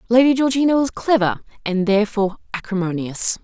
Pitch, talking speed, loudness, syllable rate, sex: 215 Hz, 120 wpm, -19 LUFS, 5.9 syllables/s, female